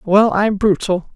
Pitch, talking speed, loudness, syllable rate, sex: 200 Hz, 155 wpm, -16 LUFS, 3.9 syllables/s, female